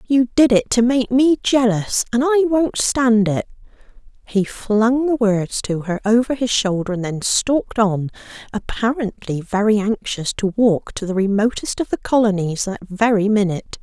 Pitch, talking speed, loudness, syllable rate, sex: 220 Hz, 170 wpm, -18 LUFS, 4.6 syllables/s, female